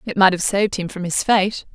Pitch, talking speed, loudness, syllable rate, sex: 190 Hz, 275 wpm, -18 LUFS, 5.6 syllables/s, female